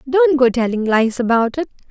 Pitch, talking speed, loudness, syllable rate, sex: 255 Hz, 190 wpm, -16 LUFS, 5.2 syllables/s, female